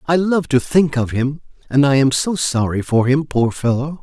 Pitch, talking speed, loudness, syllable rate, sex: 140 Hz, 225 wpm, -17 LUFS, 4.7 syllables/s, male